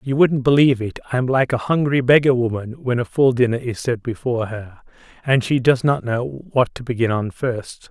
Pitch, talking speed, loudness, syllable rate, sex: 125 Hz, 215 wpm, -19 LUFS, 5.1 syllables/s, male